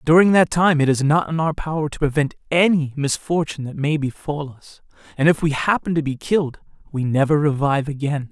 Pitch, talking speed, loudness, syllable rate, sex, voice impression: 150 Hz, 200 wpm, -19 LUFS, 5.7 syllables/s, male, masculine, adult-like, slightly middle-aged, slightly thick, slightly tensed, slightly powerful, slightly dark, slightly hard, slightly clear, slightly fluent, slightly cool, slightly intellectual, slightly sincere, calm, slightly mature, slightly friendly, slightly reassuring, slightly wild, slightly sweet, kind, slightly modest